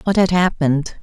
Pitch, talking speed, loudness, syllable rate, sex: 170 Hz, 175 wpm, -17 LUFS, 5.5 syllables/s, female